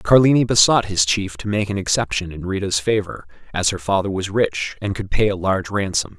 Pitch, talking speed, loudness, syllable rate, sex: 100 Hz, 215 wpm, -19 LUFS, 5.5 syllables/s, male